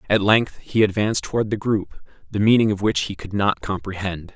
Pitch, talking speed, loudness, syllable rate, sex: 100 Hz, 205 wpm, -21 LUFS, 5.4 syllables/s, male